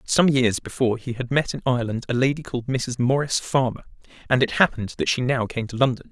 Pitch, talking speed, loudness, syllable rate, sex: 125 Hz, 225 wpm, -22 LUFS, 6.5 syllables/s, male